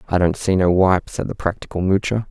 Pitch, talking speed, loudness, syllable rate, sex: 95 Hz, 235 wpm, -19 LUFS, 5.7 syllables/s, male